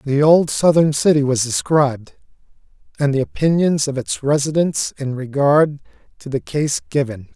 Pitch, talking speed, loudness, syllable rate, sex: 140 Hz, 145 wpm, -17 LUFS, 4.7 syllables/s, male